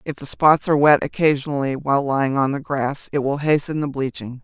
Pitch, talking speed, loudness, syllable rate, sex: 140 Hz, 215 wpm, -19 LUFS, 5.9 syllables/s, female